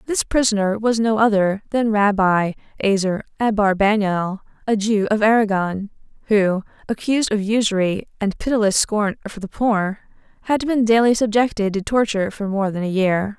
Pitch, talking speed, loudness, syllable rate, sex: 210 Hz, 145 wpm, -19 LUFS, 5.0 syllables/s, female